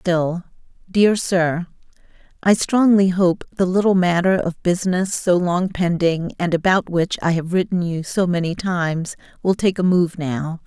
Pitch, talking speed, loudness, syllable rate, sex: 180 Hz, 160 wpm, -19 LUFS, 4.4 syllables/s, female